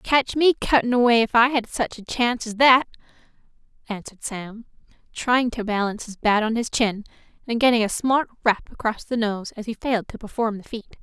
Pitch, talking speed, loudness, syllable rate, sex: 230 Hz, 200 wpm, -22 LUFS, 5.5 syllables/s, female